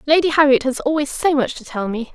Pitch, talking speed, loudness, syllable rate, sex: 275 Hz, 250 wpm, -18 LUFS, 6.0 syllables/s, female